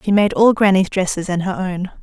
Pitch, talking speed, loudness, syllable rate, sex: 190 Hz, 235 wpm, -16 LUFS, 5.5 syllables/s, female